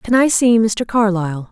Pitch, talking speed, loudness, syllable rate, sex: 215 Hz, 200 wpm, -15 LUFS, 4.8 syllables/s, female